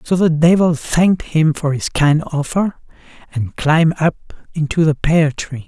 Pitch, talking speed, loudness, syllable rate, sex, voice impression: 160 Hz, 170 wpm, -16 LUFS, 4.4 syllables/s, male, masculine, adult-like, slightly thin, tensed, powerful, bright, soft, intellectual, slightly refreshing, friendly, lively, kind, slightly light